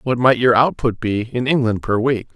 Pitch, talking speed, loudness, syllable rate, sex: 120 Hz, 230 wpm, -17 LUFS, 4.9 syllables/s, male